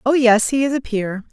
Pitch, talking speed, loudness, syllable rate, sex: 240 Hz, 275 wpm, -17 LUFS, 5.1 syllables/s, female